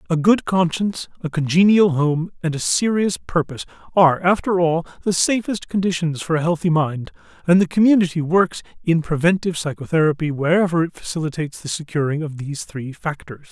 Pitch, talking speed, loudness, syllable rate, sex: 165 Hz, 160 wpm, -19 LUFS, 5.7 syllables/s, male